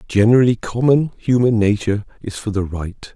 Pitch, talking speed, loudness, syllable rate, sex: 110 Hz, 150 wpm, -17 LUFS, 5.4 syllables/s, male